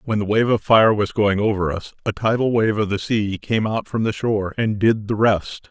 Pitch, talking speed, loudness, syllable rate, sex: 105 Hz, 255 wpm, -19 LUFS, 5.0 syllables/s, male